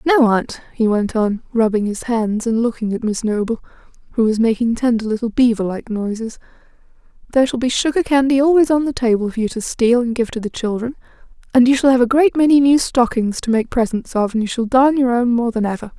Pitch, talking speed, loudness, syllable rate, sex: 240 Hz, 230 wpm, -17 LUFS, 5.8 syllables/s, female